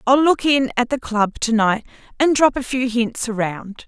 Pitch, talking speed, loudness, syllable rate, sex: 240 Hz, 215 wpm, -19 LUFS, 4.5 syllables/s, female